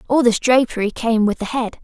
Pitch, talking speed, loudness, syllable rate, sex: 235 Hz, 230 wpm, -18 LUFS, 5.6 syllables/s, female